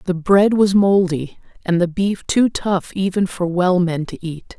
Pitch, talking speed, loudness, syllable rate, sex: 185 Hz, 195 wpm, -17 LUFS, 4.1 syllables/s, female